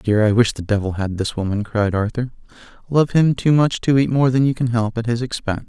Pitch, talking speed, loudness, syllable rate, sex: 115 Hz, 265 wpm, -19 LUFS, 6.0 syllables/s, male